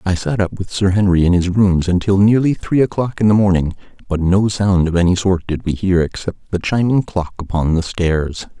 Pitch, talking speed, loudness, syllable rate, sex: 95 Hz, 225 wpm, -16 LUFS, 5.1 syllables/s, male